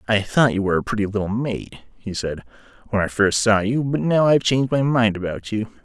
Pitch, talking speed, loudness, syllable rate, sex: 110 Hz, 235 wpm, -20 LUFS, 5.8 syllables/s, male